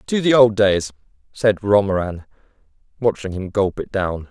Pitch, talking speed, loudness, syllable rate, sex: 100 Hz, 155 wpm, -18 LUFS, 4.6 syllables/s, male